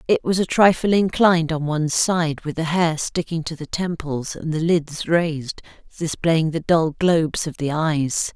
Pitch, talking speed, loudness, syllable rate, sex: 160 Hz, 185 wpm, -20 LUFS, 4.5 syllables/s, female